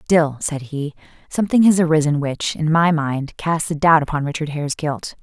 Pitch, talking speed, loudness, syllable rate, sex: 155 Hz, 195 wpm, -19 LUFS, 5.2 syllables/s, female